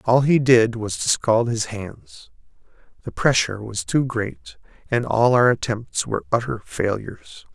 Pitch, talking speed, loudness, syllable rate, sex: 110 Hz, 160 wpm, -21 LUFS, 4.3 syllables/s, male